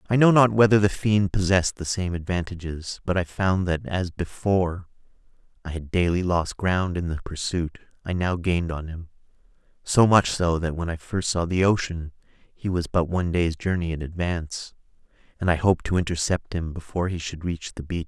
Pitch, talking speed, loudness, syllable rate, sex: 90 Hz, 195 wpm, -24 LUFS, 5.3 syllables/s, male